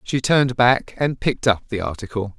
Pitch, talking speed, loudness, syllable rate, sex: 115 Hz, 200 wpm, -20 LUFS, 5.5 syllables/s, male